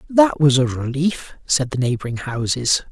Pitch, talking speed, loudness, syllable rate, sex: 140 Hz, 165 wpm, -19 LUFS, 4.6 syllables/s, male